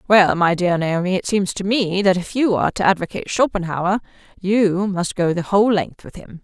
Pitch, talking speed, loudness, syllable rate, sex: 190 Hz, 215 wpm, -19 LUFS, 5.3 syllables/s, female